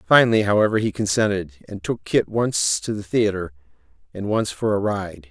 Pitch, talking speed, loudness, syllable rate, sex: 110 Hz, 180 wpm, -21 LUFS, 5.3 syllables/s, male